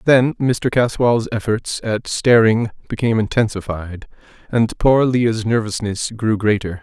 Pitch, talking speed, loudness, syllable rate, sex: 115 Hz, 125 wpm, -18 LUFS, 4.3 syllables/s, male